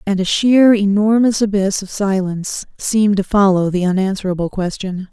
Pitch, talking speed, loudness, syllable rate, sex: 200 Hz, 150 wpm, -16 LUFS, 5.1 syllables/s, female